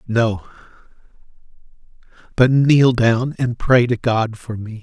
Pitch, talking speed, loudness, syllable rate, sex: 120 Hz, 125 wpm, -17 LUFS, 3.6 syllables/s, male